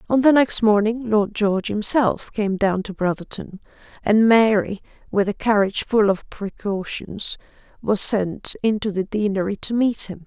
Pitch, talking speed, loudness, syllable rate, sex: 210 Hz, 160 wpm, -20 LUFS, 4.5 syllables/s, female